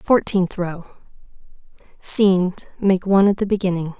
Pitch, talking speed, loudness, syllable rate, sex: 190 Hz, 105 wpm, -19 LUFS, 4.7 syllables/s, female